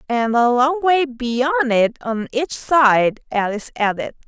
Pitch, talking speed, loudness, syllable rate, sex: 255 Hz, 155 wpm, -18 LUFS, 3.9 syllables/s, female